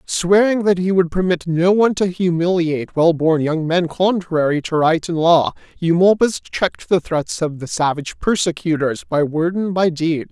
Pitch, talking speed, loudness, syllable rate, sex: 170 Hz, 180 wpm, -17 LUFS, 4.8 syllables/s, male